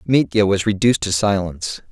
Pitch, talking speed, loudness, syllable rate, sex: 100 Hz, 155 wpm, -18 LUFS, 5.7 syllables/s, male